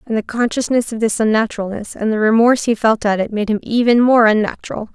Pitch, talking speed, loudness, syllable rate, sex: 220 Hz, 220 wpm, -16 LUFS, 6.3 syllables/s, female